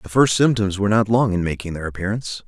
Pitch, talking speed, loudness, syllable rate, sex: 105 Hz, 240 wpm, -20 LUFS, 6.6 syllables/s, male